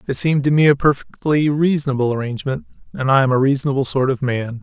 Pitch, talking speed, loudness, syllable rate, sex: 135 Hz, 210 wpm, -17 LUFS, 6.7 syllables/s, male